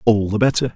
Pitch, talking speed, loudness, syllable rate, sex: 115 Hz, 240 wpm, -18 LUFS, 6.4 syllables/s, male